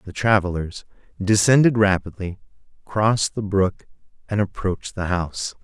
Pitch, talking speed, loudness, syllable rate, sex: 95 Hz, 115 wpm, -21 LUFS, 5.0 syllables/s, male